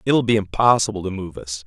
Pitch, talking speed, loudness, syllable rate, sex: 100 Hz, 215 wpm, -20 LUFS, 5.8 syllables/s, male